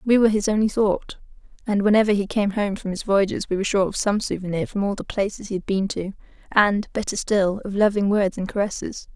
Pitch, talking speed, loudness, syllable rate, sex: 200 Hz, 230 wpm, -22 LUFS, 6.0 syllables/s, female